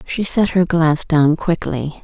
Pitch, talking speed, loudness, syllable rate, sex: 165 Hz, 175 wpm, -16 LUFS, 3.6 syllables/s, female